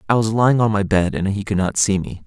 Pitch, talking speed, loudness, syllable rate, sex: 105 Hz, 315 wpm, -18 LUFS, 6.3 syllables/s, male